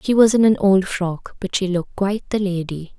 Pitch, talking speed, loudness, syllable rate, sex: 195 Hz, 240 wpm, -19 LUFS, 5.6 syllables/s, female